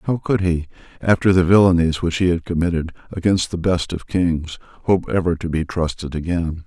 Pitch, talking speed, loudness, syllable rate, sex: 85 Hz, 190 wpm, -19 LUFS, 5.4 syllables/s, male